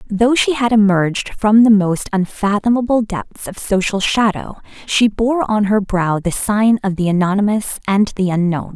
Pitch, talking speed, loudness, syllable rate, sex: 205 Hz, 170 wpm, -15 LUFS, 4.5 syllables/s, female